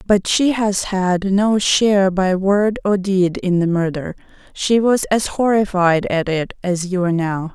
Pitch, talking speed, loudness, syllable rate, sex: 190 Hz, 185 wpm, -17 LUFS, 4.1 syllables/s, female